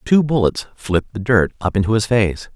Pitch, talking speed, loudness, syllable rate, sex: 110 Hz, 210 wpm, -18 LUFS, 5.2 syllables/s, male